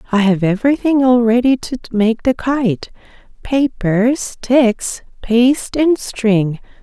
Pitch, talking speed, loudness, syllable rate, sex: 240 Hz, 115 wpm, -15 LUFS, 3.6 syllables/s, female